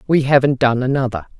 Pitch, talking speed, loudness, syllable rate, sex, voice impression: 130 Hz, 170 wpm, -16 LUFS, 6.2 syllables/s, female, masculine, slightly feminine, gender-neutral, very adult-like, slightly middle-aged, thick, tensed, slightly weak, slightly dark, hard, slightly muffled, slightly halting, very cool, intellectual, sincere, very calm, slightly friendly, slightly reassuring, very unique, slightly elegant, strict